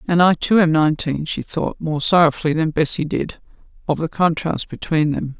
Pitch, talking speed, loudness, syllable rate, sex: 160 Hz, 190 wpm, -19 LUFS, 5.3 syllables/s, female